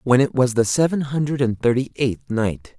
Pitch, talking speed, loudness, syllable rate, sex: 125 Hz, 215 wpm, -20 LUFS, 4.9 syllables/s, male